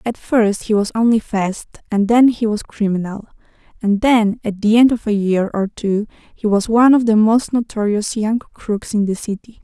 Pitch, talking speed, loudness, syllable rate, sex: 215 Hz, 205 wpm, -17 LUFS, 4.8 syllables/s, female